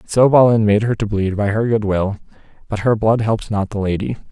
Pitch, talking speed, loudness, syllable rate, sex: 105 Hz, 250 wpm, -17 LUFS, 6.3 syllables/s, male